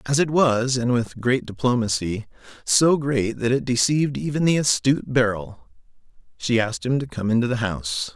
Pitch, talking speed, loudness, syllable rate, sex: 120 Hz, 160 wpm, -21 LUFS, 5.2 syllables/s, male